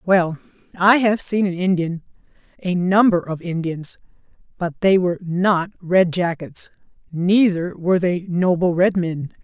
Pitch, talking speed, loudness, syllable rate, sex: 180 Hz, 125 wpm, -19 LUFS, 4.3 syllables/s, female